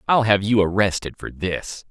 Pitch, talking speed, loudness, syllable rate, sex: 100 Hz, 190 wpm, -20 LUFS, 4.7 syllables/s, male